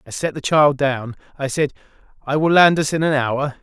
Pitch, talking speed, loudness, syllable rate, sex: 145 Hz, 230 wpm, -18 LUFS, 5.2 syllables/s, male